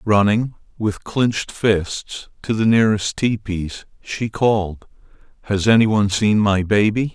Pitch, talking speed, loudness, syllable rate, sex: 105 Hz, 135 wpm, -19 LUFS, 4.2 syllables/s, male